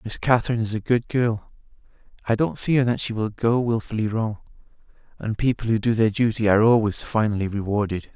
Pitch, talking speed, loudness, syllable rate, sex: 110 Hz, 185 wpm, -22 LUFS, 5.8 syllables/s, male